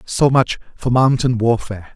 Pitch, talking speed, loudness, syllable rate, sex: 120 Hz, 155 wpm, -17 LUFS, 4.8 syllables/s, male